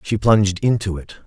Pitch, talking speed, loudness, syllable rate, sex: 100 Hz, 190 wpm, -18 LUFS, 5.6 syllables/s, male